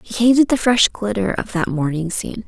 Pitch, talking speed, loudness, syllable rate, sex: 210 Hz, 220 wpm, -18 LUFS, 5.4 syllables/s, female